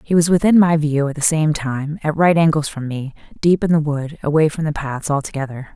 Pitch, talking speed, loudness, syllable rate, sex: 150 Hz, 240 wpm, -18 LUFS, 5.5 syllables/s, female